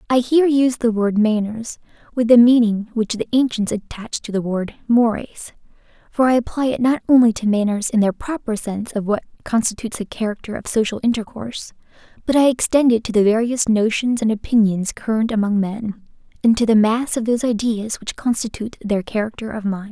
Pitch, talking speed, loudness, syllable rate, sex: 225 Hz, 190 wpm, -19 LUFS, 5.6 syllables/s, female